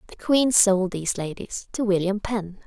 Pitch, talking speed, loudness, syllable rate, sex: 200 Hz, 180 wpm, -23 LUFS, 4.7 syllables/s, female